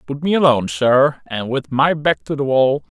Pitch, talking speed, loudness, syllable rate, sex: 140 Hz, 220 wpm, -17 LUFS, 4.9 syllables/s, male